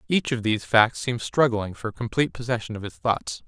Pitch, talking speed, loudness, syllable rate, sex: 115 Hz, 205 wpm, -24 LUFS, 5.8 syllables/s, male